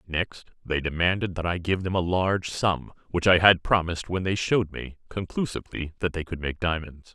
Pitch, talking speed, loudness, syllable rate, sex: 90 Hz, 200 wpm, -25 LUFS, 5.5 syllables/s, male